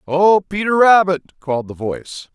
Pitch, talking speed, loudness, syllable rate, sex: 175 Hz, 155 wpm, -16 LUFS, 4.7 syllables/s, male